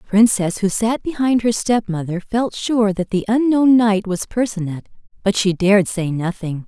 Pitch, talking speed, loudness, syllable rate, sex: 210 Hz, 180 wpm, -18 LUFS, 4.7 syllables/s, female